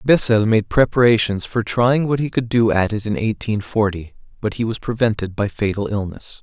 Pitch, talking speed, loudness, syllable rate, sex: 110 Hz, 195 wpm, -19 LUFS, 5.1 syllables/s, male